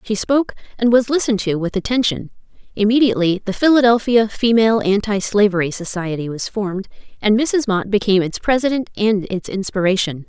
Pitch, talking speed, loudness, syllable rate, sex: 210 Hz, 150 wpm, -17 LUFS, 5.9 syllables/s, female